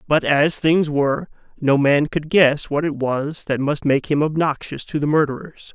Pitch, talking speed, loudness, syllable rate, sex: 150 Hz, 200 wpm, -19 LUFS, 4.6 syllables/s, male